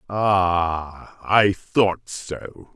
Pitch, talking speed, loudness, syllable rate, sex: 90 Hz, 85 wpm, -21 LUFS, 1.6 syllables/s, male